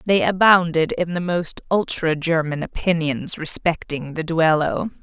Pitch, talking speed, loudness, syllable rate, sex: 165 Hz, 130 wpm, -20 LUFS, 4.2 syllables/s, female